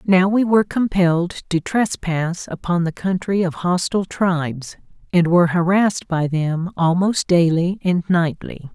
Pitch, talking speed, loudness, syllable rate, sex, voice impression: 180 Hz, 145 wpm, -19 LUFS, 4.4 syllables/s, female, very feminine, very middle-aged, thin, tensed, weak, bright, very soft, very clear, very fluent, very cute, slightly cool, very intellectual, very refreshing, very sincere, very calm, very friendly, very reassuring, very unique, very elegant, slightly wild, very sweet, lively, very kind, modest, light